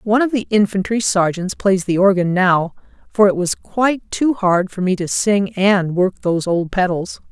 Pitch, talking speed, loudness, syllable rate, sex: 195 Hz, 195 wpm, -17 LUFS, 4.7 syllables/s, female